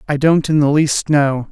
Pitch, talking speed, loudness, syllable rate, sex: 145 Hz, 240 wpm, -14 LUFS, 4.5 syllables/s, male